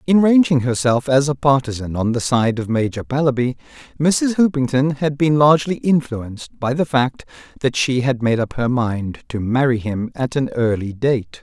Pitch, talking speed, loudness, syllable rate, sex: 130 Hz, 185 wpm, -18 LUFS, 4.8 syllables/s, male